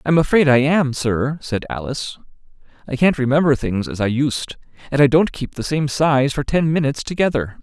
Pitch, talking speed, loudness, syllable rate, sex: 140 Hz, 190 wpm, -18 LUFS, 5.2 syllables/s, male